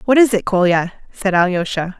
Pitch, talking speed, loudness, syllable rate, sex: 195 Hz, 180 wpm, -16 LUFS, 5.4 syllables/s, female